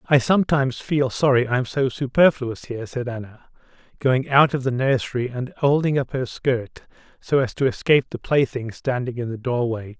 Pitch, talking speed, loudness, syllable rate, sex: 130 Hz, 180 wpm, -21 LUFS, 5.1 syllables/s, male